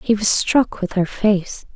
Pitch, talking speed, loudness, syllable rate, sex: 205 Hz, 205 wpm, -18 LUFS, 3.8 syllables/s, female